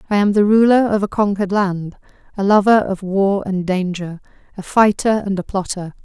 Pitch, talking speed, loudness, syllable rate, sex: 195 Hz, 190 wpm, -17 LUFS, 5.2 syllables/s, female